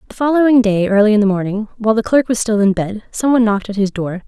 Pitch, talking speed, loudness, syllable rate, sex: 215 Hz, 265 wpm, -15 LUFS, 7.0 syllables/s, female